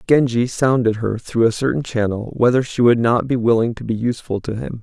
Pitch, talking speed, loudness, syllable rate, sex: 115 Hz, 225 wpm, -18 LUFS, 5.6 syllables/s, male